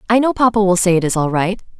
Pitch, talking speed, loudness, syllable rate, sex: 195 Hz, 300 wpm, -15 LUFS, 6.7 syllables/s, female